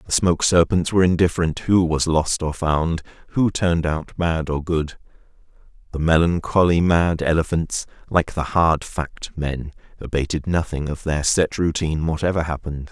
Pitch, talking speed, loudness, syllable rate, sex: 80 Hz, 155 wpm, -21 LUFS, 4.9 syllables/s, male